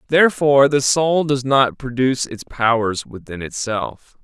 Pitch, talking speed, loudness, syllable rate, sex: 130 Hz, 140 wpm, -18 LUFS, 4.5 syllables/s, male